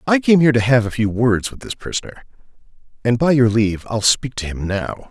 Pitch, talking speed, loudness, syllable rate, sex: 120 Hz, 235 wpm, -18 LUFS, 5.8 syllables/s, male